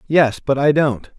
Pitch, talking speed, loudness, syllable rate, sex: 140 Hz, 205 wpm, -17 LUFS, 4.2 syllables/s, male